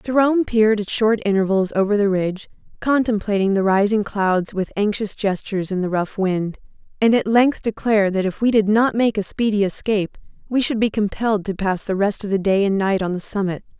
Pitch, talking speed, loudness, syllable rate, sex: 205 Hz, 210 wpm, -19 LUFS, 5.6 syllables/s, female